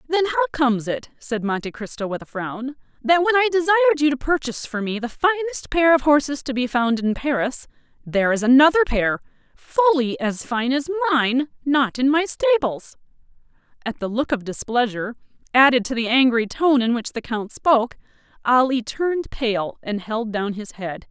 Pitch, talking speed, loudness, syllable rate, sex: 265 Hz, 185 wpm, -20 LUFS, 5.2 syllables/s, female